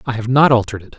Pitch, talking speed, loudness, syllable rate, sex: 120 Hz, 305 wpm, -14 LUFS, 8.1 syllables/s, male